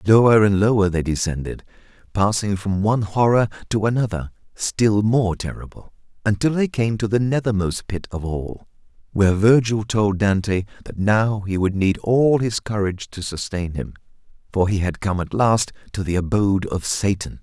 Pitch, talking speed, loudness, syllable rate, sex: 105 Hz, 170 wpm, -20 LUFS, 4.9 syllables/s, male